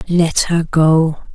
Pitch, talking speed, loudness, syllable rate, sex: 165 Hz, 135 wpm, -14 LUFS, 3.0 syllables/s, female